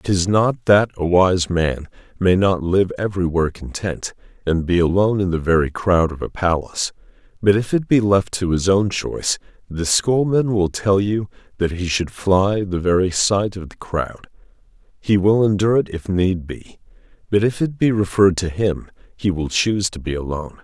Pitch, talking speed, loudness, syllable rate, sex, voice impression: 95 Hz, 190 wpm, -19 LUFS, 4.9 syllables/s, male, very masculine, very adult-like, thick, cool, intellectual, calm, slightly sweet